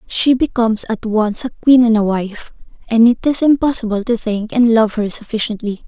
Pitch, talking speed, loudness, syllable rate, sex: 225 Hz, 195 wpm, -15 LUFS, 5.1 syllables/s, female